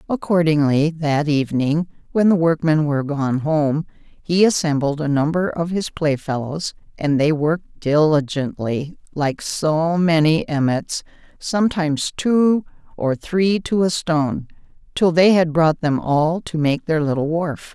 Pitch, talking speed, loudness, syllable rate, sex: 160 Hz, 140 wpm, -19 LUFS, 4.2 syllables/s, female